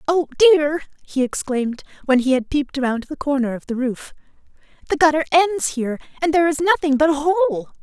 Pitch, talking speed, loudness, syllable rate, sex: 295 Hz, 190 wpm, -19 LUFS, 5.7 syllables/s, female